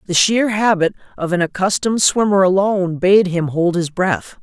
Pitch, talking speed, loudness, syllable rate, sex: 190 Hz, 175 wpm, -16 LUFS, 5.0 syllables/s, female